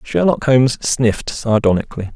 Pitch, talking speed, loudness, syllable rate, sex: 120 Hz, 110 wpm, -16 LUFS, 5.4 syllables/s, male